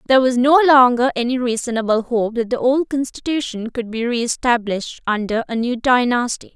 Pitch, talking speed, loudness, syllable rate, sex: 245 Hz, 165 wpm, -18 LUFS, 5.3 syllables/s, female